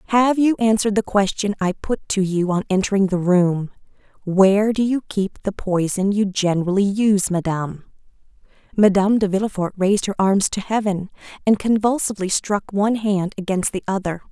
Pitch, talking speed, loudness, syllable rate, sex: 200 Hz, 160 wpm, -19 LUFS, 5.4 syllables/s, female